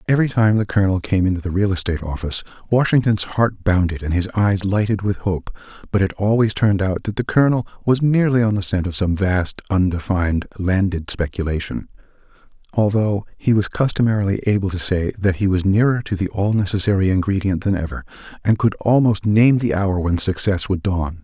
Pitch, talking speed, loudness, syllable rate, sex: 100 Hz, 185 wpm, -19 LUFS, 5.8 syllables/s, male